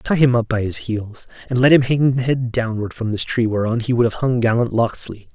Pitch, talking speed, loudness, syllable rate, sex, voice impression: 115 Hz, 245 wpm, -18 LUFS, 5.1 syllables/s, male, very masculine, very adult-like, very middle-aged, relaxed, slightly weak, slightly dark, very soft, slightly muffled, fluent, cool, very intellectual, sincere, calm, mature, very friendly, very reassuring, unique, very elegant, slightly wild, sweet, slightly lively, very kind, modest